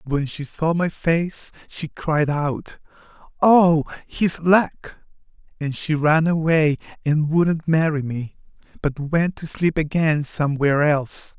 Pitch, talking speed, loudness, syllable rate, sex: 155 Hz, 135 wpm, -20 LUFS, 3.8 syllables/s, male